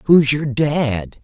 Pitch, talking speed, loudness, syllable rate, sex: 135 Hz, 145 wpm, -17 LUFS, 2.8 syllables/s, male